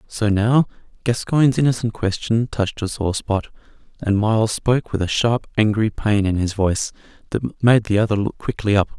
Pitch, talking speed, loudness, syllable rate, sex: 110 Hz, 180 wpm, -20 LUFS, 5.2 syllables/s, male